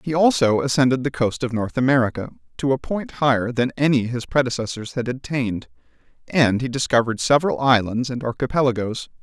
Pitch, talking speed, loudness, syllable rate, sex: 125 Hz, 165 wpm, -21 LUFS, 5.9 syllables/s, male